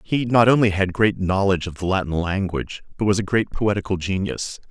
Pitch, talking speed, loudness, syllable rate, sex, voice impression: 95 Hz, 205 wpm, -21 LUFS, 5.8 syllables/s, male, very masculine, very adult-like, cool, sincere, slightly mature, elegant, slightly sweet